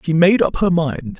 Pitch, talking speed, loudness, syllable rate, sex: 165 Hz, 250 wpm, -16 LUFS, 4.7 syllables/s, male